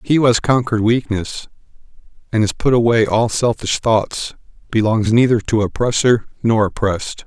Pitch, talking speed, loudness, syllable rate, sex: 115 Hz, 150 wpm, -16 LUFS, 5.0 syllables/s, male